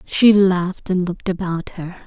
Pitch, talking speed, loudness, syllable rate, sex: 185 Hz, 175 wpm, -18 LUFS, 4.6 syllables/s, female